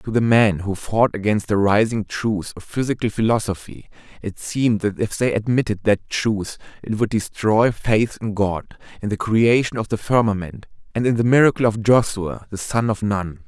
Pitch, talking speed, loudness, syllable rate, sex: 110 Hz, 185 wpm, -20 LUFS, 4.9 syllables/s, male